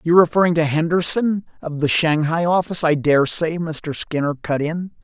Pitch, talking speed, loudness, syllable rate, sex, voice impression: 160 Hz, 180 wpm, -19 LUFS, 5.2 syllables/s, male, masculine, adult-like, tensed, slightly powerful, slightly dark, slightly hard, clear, fluent, cool, very intellectual, slightly refreshing, very sincere, very calm, friendly, reassuring, slightly unique, elegant, slightly wild, slightly sweet, slightly lively, slightly strict